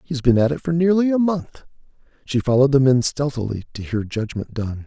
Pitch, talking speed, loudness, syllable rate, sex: 130 Hz, 210 wpm, -20 LUFS, 5.9 syllables/s, male